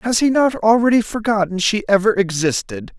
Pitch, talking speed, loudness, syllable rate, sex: 205 Hz, 160 wpm, -17 LUFS, 5.4 syllables/s, male